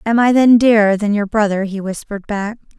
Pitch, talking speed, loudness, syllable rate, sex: 210 Hz, 215 wpm, -15 LUFS, 5.6 syllables/s, female